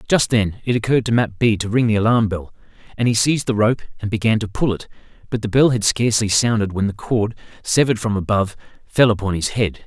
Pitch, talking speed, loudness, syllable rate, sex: 110 Hz, 230 wpm, -19 LUFS, 6.2 syllables/s, male